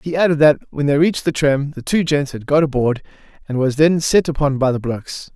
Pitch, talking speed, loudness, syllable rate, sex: 145 Hz, 245 wpm, -17 LUFS, 5.7 syllables/s, male